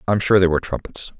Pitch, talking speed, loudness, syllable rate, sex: 90 Hz, 250 wpm, -18 LUFS, 6.9 syllables/s, male